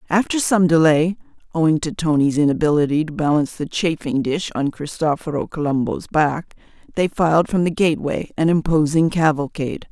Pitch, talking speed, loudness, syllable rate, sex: 160 Hz, 135 wpm, -19 LUFS, 5.4 syllables/s, female